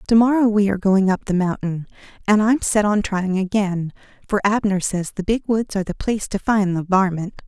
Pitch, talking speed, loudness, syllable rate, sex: 200 Hz, 215 wpm, -19 LUFS, 5.4 syllables/s, female